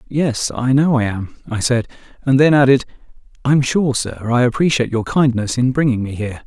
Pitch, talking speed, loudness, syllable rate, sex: 125 Hz, 195 wpm, -17 LUFS, 5.6 syllables/s, male